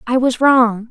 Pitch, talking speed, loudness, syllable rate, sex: 245 Hz, 200 wpm, -14 LUFS, 3.8 syllables/s, female